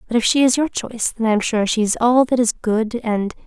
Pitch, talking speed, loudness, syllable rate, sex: 230 Hz, 245 wpm, -18 LUFS, 4.8 syllables/s, female